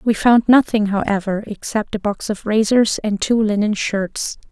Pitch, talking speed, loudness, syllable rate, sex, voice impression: 215 Hz, 175 wpm, -18 LUFS, 4.4 syllables/s, female, feminine, young, cute, friendly, slightly kind